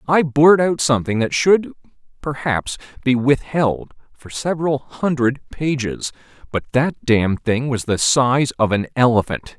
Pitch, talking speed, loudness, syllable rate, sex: 130 Hz, 140 wpm, -18 LUFS, 4.3 syllables/s, male